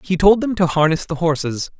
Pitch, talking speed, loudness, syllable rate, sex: 170 Hz, 235 wpm, -17 LUFS, 5.5 syllables/s, male